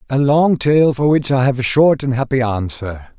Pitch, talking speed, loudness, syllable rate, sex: 130 Hz, 225 wpm, -15 LUFS, 4.7 syllables/s, male